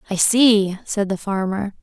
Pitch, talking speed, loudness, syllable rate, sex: 205 Hz, 165 wpm, -18 LUFS, 4.0 syllables/s, female